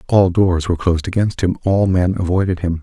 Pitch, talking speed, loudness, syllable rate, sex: 90 Hz, 215 wpm, -17 LUFS, 5.8 syllables/s, male